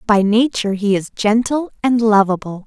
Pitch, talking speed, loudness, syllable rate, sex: 215 Hz, 160 wpm, -16 LUFS, 5.0 syllables/s, female